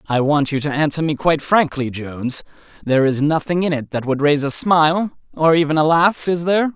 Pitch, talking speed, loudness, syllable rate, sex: 155 Hz, 215 wpm, -17 LUFS, 5.8 syllables/s, male